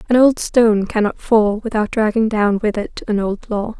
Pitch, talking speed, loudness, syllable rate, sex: 215 Hz, 205 wpm, -17 LUFS, 4.8 syllables/s, female